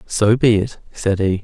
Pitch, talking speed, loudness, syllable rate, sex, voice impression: 105 Hz, 210 wpm, -17 LUFS, 4.2 syllables/s, male, masculine, slightly young, slightly adult-like, thick, relaxed, weak, dark, soft, slightly clear, slightly halting, raspy, slightly cool, intellectual, sincere, very calm, very mature, friendly, reassuring, unique, elegant, sweet, slightly lively, very kind, modest